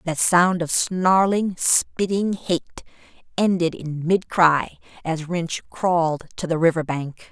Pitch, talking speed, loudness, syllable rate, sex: 170 Hz, 140 wpm, -21 LUFS, 3.7 syllables/s, female